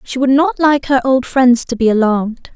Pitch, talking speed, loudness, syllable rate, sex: 260 Hz, 235 wpm, -13 LUFS, 5.0 syllables/s, female